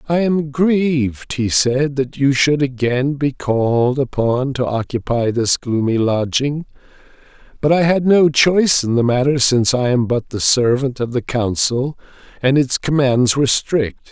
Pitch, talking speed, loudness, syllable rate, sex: 130 Hz, 165 wpm, -16 LUFS, 4.3 syllables/s, male